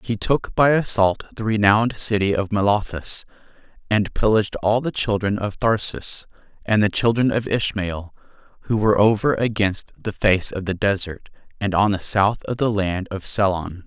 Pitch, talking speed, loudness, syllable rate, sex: 105 Hz, 175 wpm, -21 LUFS, 5.1 syllables/s, male